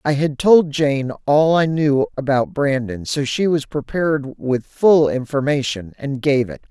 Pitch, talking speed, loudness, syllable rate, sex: 140 Hz, 170 wpm, -18 LUFS, 4.2 syllables/s, male